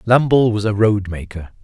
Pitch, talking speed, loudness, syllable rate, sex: 105 Hz, 145 wpm, -16 LUFS, 5.6 syllables/s, male